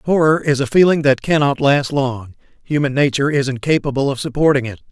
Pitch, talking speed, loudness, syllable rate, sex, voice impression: 140 Hz, 185 wpm, -16 LUFS, 5.9 syllables/s, male, masculine, adult-like, tensed, powerful, bright, clear, fluent, cool, intellectual, slightly refreshing, calm, friendly, reassuring, lively, slightly light